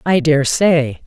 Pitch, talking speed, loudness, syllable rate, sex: 150 Hz, 170 wpm, -14 LUFS, 3.1 syllables/s, female